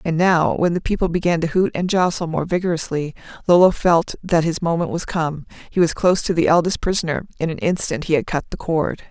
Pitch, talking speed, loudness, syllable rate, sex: 165 Hz, 220 wpm, -19 LUFS, 5.8 syllables/s, female